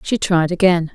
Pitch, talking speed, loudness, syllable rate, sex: 175 Hz, 190 wpm, -16 LUFS, 4.7 syllables/s, female